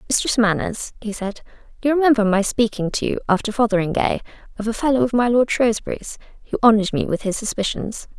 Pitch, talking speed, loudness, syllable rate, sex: 220 Hz, 185 wpm, -20 LUFS, 6.2 syllables/s, female